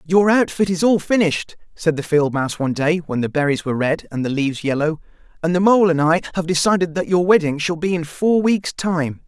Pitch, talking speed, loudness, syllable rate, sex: 165 Hz, 235 wpm, -18 LUFS, 5.8 syllables/s, male